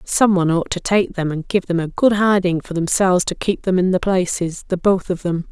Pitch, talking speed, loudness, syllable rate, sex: 180 Hz, 250 wpm, -18 LUFS, 5.4 syllables/s, female